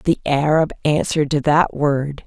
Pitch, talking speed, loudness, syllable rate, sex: 150 Hz, 160 wpm, -18 LUFS, 4.6 syllables/s, female